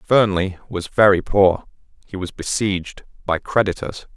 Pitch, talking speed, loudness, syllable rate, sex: 95 Hz, 130 wpm, -19 LUFS, 4.4 syllables/s, male